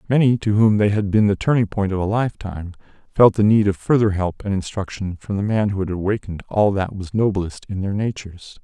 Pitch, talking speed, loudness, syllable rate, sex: 100 Hz, 230 wpm, -20 LUFS, 5.9 syllables/s, male